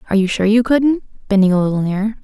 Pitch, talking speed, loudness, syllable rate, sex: 210 Hz, 240 wpm, -16 LUFS, 6.5 syllables/s, female